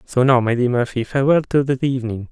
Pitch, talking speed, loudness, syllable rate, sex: 130 Hz, 235 wpm, -18 LUFS, 6.4 syllables/s, male